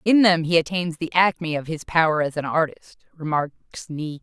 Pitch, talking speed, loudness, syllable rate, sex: 160 Hz, 200 wpm, -22 LUFS, 4.8 syllables/s, female